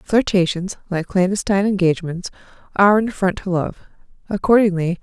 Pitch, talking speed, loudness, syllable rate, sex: 190 Hz, 120 wpm, -18 LUFS, 5.9 syllables/s, female